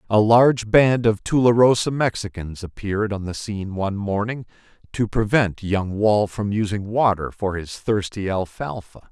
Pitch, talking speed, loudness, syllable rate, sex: 105 Hz, 150 wpm, -21 LUFS, 4.7 syllables/s, male